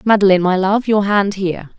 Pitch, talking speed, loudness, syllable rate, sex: 195 Hz, 200 wpm, -15 LUFS, 6.1 syllables/s, female